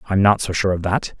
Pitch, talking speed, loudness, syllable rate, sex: 95 Hz, 300 wpm, -19 LUFS, 6.1 syllables/s, male